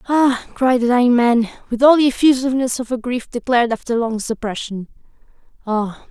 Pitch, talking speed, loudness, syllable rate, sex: 245 Hz, 165 wpm, -17 LUFS, 5.5 syllables/s, female